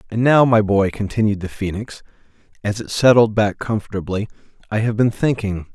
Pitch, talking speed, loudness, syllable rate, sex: 105 Hz, 165 wpm, -18 LUFS, 5.3 syllables/s, male